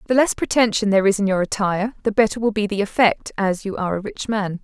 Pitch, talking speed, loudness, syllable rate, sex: 210 Hz, 260 wpm, -20 LUFS, 6.5 syllables/s, female